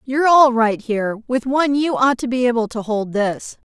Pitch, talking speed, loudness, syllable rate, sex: 240 Hz, 225 wpm, -17 LUFS, 5.2 syllables/s, female